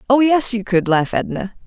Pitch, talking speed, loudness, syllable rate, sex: 220 Hz, 215 wpm, -17 LUFS, 5.7 syllables/s, female